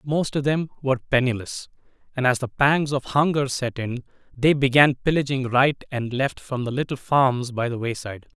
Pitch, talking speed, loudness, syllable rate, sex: 130 Hz, 185 wpm, -22 LUFS, 5.0 syllables/s, male